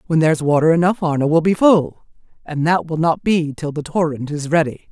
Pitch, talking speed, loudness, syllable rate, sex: 160 Hz, 220 wpm, -17 LUFS, 5.7 syllables/s, female